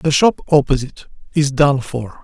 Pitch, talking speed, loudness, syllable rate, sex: 140 Hz, 160 wpm, -16 LUFS, 5.0 syllables/s, male